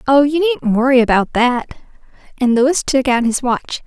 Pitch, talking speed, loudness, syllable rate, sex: 260 Hz, 185 wpm, -15 LUFS, 5.0 syllables/s, female